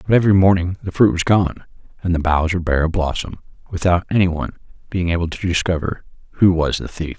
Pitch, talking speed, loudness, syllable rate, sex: 85 Hz, 200 wpm, -18 LUFS, 6.2 syllables/s, male